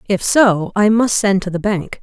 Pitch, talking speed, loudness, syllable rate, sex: 200 Hz, 235 wpm, -15 LUFS, 4.4 syllables/s, female